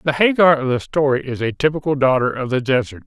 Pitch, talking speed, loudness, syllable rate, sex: 140 Hz, 235 wpm, -18 LUFS, 6.1 syllables/s, male